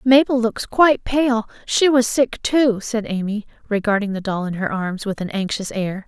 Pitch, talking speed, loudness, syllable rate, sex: 220 Hz, 195 wpm, -19 LUFS, 4.7 syllables/s, female